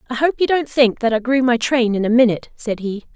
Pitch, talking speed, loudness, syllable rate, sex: 240 Hz, 285 wpm, -17 LUFS, 6.1 syllables/s, female